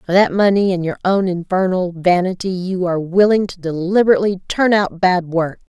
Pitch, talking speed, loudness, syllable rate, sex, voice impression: 185 Hz, 175 wpm, -16 LUFS, 5.4 syllables/s, female, feminine, very adult-like, slightly clear, slightly intellectual, slightly elegant